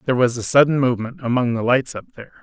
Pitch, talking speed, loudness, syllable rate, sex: 125 Hz, 245 wpm, -18 LUFS, 7.7 syllables/s, male